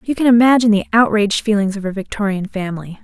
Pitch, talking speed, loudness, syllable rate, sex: 210 Hz, 200 wpm, -16 LUFS, 7.0 syllables/s, female